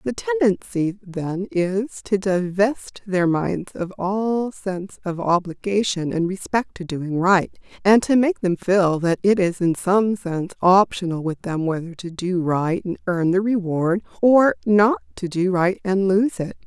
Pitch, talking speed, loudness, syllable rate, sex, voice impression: 190 Hz, 175 wpm, -21 LUFS, 4.0 syllables/s, female, feminine, middle-aged, tensed, slightly powerful, bright, clear, fluent, intellectual, friendly, reassuring, lively, kind